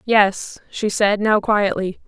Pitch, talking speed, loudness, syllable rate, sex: 205 Hz, 145 wpm, -18 LUFS, 3.3 syllables/s, female